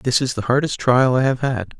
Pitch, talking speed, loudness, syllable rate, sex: 125 Hz, 265 wpm, -18 LUFS, 5.2 syllables/s, male